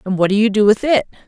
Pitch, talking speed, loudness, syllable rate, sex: 215 Hz, 330 wpm, -15 LUFS, 7.0 syllables/s, female